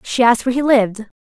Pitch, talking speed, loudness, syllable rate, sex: 240 Hz, 245 wpm, -15 LUFS, 8.1 syllables/s, female